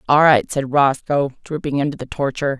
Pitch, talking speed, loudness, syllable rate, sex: 140 Hz, 185 wpm, -18 LUFS, 5.7 syllables/s, female